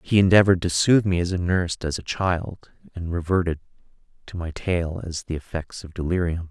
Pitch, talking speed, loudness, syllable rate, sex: 90 Hz, 195 wpm, -23 LUFS, 5.6 syllables/s, male